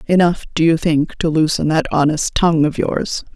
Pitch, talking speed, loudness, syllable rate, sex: 160 Hz, 195 wpm, -16 LUFS, 5.1 syllables/s, female